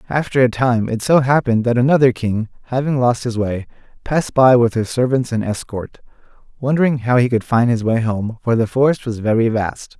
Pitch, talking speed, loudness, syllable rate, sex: 120 Hz, 205 wpm, -17 LUFS, 5.5 syllables/s, male